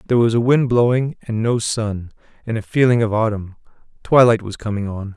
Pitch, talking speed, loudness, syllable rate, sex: 115 Hz, 200 wpm, -18 LUFS, 5.6 syllables/s, male